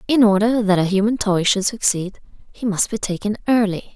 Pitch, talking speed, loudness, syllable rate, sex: 205 Hz, 195 wpm, -18 LUFS, 5.3 syllables/s, female